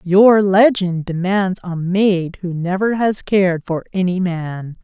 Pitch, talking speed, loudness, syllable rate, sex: 185 Hz, 150 wpm, -17 LUFS, 3.8 syllables/s, female